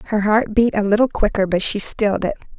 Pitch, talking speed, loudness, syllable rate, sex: 210 Hz, 230 wpm, -18 LUFS, 5.6 syllables/s, female